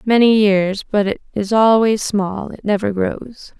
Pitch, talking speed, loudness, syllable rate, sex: 210 Hz, 165 wpm, -16 LUFS, 3.9 syllables/s, female